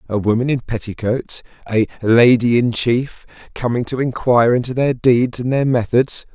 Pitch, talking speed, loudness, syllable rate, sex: 120 Hz, 160 wpm, -17 LUFS, 4.7 syllables/s, male